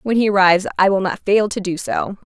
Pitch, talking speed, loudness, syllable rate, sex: 190 Hz, 260 wpm, -17 LUFS, 5.8 syllables/s, female